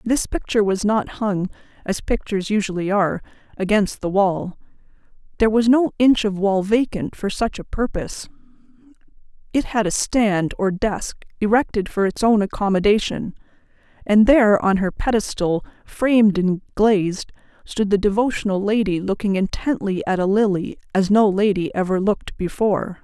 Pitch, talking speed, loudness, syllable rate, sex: 205 Hz, 150 wpm, -20 LUFS, 5.0 syllables/s, female